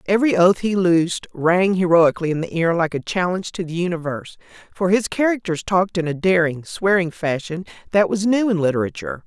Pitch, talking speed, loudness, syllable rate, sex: 180 Hz, 190 wpm, -19 LUFS, 6.0 syllables/s, female